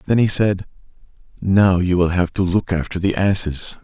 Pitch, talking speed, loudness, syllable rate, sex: 95 Hz, 190 wpm, -18 LUFS, 4.8 syllables/s, male